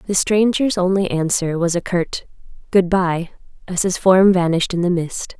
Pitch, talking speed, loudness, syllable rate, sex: 180 Hz, 180 wpm, -18 LUFS, 4.7 syllables/s, female